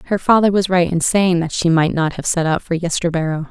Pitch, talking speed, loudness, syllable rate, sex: 175 Hz, 255 wpm, -16 LUFS, 5.8 syllables/s, female